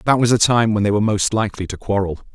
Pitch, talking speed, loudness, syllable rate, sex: 105 Hz, 280 wpm, -18 LUFS, 7.0 syllables/s, male